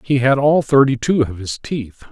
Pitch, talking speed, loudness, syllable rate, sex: 130 Hz, 225 wpm, -16 LUFS, 4.6 syllables/s, male